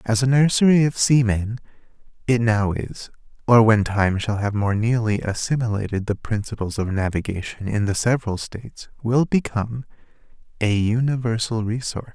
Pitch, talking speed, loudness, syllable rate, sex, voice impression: 110 Hz, 145 wpm, -21 LUFS, 5.1 syllables/s, male, very masculine, slightly old, very thick, tensed, very powerful, bright, very soft, muffled, fluent, slightly raspy, very cool, very intellectual, refreshing, sincere, very calm, very friendly, very reassuring, very unique, elegant, wild, very sweet, lively, very kind, slightly modest